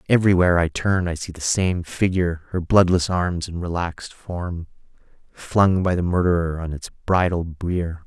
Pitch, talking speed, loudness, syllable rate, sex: 85 Hz, 155 wpm, -21 LUFS, 4.8 syllables/s, male